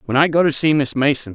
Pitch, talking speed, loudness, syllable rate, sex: 145 Hz, 310 wpm, -17 LUFS, 6.4 syllables/s, male